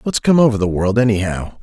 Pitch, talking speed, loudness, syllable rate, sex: 105 Hz, 220 wpm, -16 LUFS, 5.9 syllables/s, male